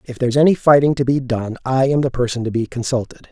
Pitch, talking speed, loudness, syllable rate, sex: 130 Hz, 270 wpm, -17 LUFS, 6.7 syllables/s, male